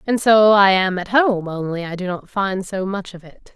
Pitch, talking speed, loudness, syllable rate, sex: 195 Hz, 235 wpm, -18 LUFS, 4.7 syllables/s, female